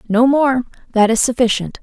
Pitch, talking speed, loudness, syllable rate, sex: 240 Hz, 165 wpm, -15 LUFS, 5.3 syllables/s, female